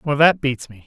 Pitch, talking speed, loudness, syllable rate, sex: 140 Hz, 280 wpm, -18 LUFS, 4.8 syllables/s, male